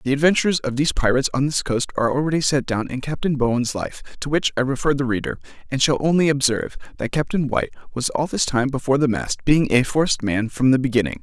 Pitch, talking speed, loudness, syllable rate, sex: 135 Hz, 230 wpm, -21 LUFS, 6.5 syllables/s, male